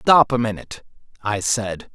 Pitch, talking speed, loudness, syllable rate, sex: 110 Hz, 155 wpm, -20 LUFS, 5.0 syllables/s, male